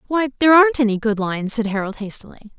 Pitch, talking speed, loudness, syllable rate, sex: 235 Hz, 210 wpm, -18 LUFS, 6.6 syllables/s, female